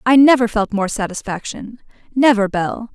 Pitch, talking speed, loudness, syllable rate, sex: 225 Hz, 120 wpm, -17 LUFS, 5.0 syllables/s, female